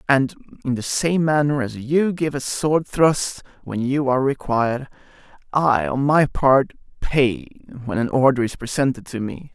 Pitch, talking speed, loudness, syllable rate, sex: 135 Hz, 170 wpm, -20 LUFS, 4.5 syllables/s, male